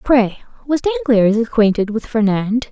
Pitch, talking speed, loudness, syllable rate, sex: 230 Hz, 130 wpm, -16 LUFS, 4.3 syllables/s, female